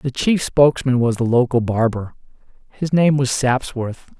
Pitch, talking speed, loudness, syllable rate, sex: 130 Hz, 155 wpm, -18 LUFS, 4.8 syllables/s, male